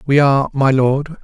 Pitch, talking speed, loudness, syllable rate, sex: 140 Hz, 195 wpm, -14 LUFS, 5.3 syllables/s, male